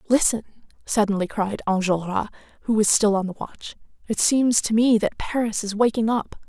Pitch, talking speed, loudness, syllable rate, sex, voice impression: 215 Hz, 175 wpm, -22 LUFS, 5.2 syllables/s, female, feminine, adult-like, fluent, sincere, slightly calm, slightly elegant, slightly sweet